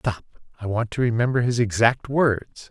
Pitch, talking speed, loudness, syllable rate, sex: 115 Hz, 180 wpm, -22 LUFS, 4.7 syllables/s, male